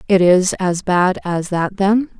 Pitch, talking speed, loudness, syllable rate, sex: 190 Hz, 190 wpm, -16 LUFS, 3.7 syllables/s, female